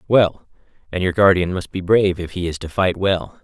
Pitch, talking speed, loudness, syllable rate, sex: 90 Hz, 225 wpm, -19 LUFS, 5.3 syllables/s, male